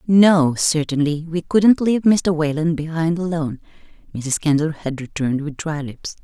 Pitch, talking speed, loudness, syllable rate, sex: 160 Hz, 155 wpm, -19 LUFS, 4.8 syllables/s, female